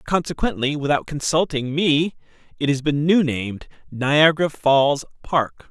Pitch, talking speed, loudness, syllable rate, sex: 145 Hz, 125 wpm, -20 LUFS, 4.5 syllables/s, male